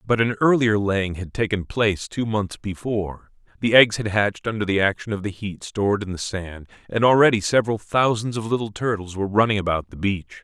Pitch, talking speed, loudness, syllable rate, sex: 105 Hz, 205 wpm, -21 LUFS, 5.6 syllables/s, male